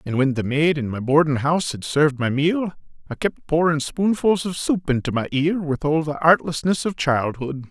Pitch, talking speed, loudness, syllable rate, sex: 150 Hz, 210 wpm, -21 LUFS, 5.0 syllables/s, male